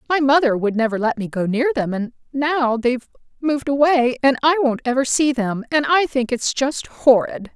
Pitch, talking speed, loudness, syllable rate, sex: 260 Hz, 205 wpm, -19 LUFS, 5.0 syllables/s, female